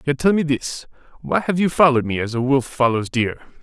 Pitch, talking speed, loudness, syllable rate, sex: 140 Hz, 230 wpm, -19 LUFS, 5.6 syllables/s, male